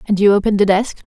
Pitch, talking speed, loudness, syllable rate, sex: 205 Hz, 270 wpm, -14 LUFS, 7.3 syllables/s, female